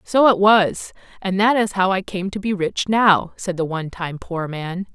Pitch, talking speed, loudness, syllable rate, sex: 190 Hz, 220 wpm, -19 LUFS, 4.5 syllables/s, female